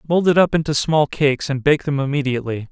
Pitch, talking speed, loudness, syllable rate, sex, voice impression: 145 Hz, 220 wpm, -18 LUFS, 6.4 syllables/s, male, masculine, adult-like, slightly thick, slightly relaxed, slightly weak, slightly dark, slightly soft, muffled, fluent, slightly cool, intellectual, slightly refreshing, sincere, calm, slightly mature, slightly friendly, slightly reassuring, slightly unique, slightly elegant, lively, kind, modest